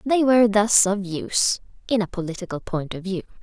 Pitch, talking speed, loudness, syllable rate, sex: 200 Hz, 195 wpm, -21 LUFS, 5.5 syllables/s, female